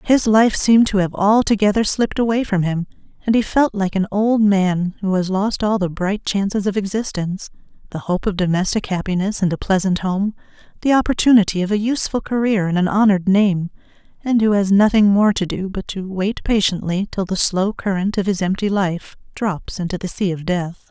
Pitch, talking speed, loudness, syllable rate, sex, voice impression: 200 Hz, 200 wpm, -18 LUFS, 5.4 syllables/s, female, very feminine, adult-like, slightly fluent, slightly intellectual, slightly elegant